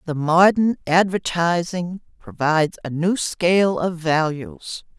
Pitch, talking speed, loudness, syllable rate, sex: 170 Hz, 110 wpm, -19 LUFS, 3.9 syllables/s, female